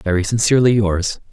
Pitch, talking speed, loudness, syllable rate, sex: 105 Hz, 135 wpm, -16 LUFS, 5.8 syllables/s, male